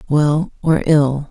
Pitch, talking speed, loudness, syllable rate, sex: 150 Hz, 140 wpm, -16 LUFS, 3.0 syllables/s, female